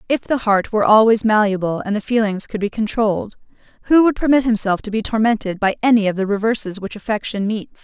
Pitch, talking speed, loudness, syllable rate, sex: 215 Hz, 205 wpm, -17 LUFS, 6.0 syllables/s, female